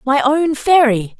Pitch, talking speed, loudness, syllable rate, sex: 275 Hz, 150 wpm, -14 LUFS, 3.9 syllables/s, female